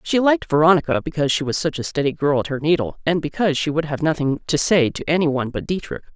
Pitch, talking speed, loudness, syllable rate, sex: 155 Hz, 255 wpm, -20 LUFS, 6.9 syllables/s, female